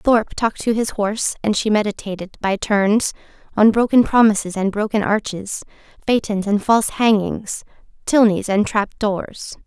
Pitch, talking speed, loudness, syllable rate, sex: 210 Hz, 150 wpm, -18 LUFS, 4.8 syllables/s, female